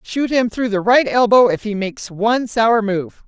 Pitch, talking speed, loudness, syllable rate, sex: 220 Hz, 220 wpm, -16 LUFS, 4.8 syllables/s, female